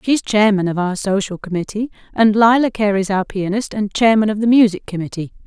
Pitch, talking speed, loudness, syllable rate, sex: 205 Hz, 185 wpm, -17 LUFS, 5.6 syllables/s, female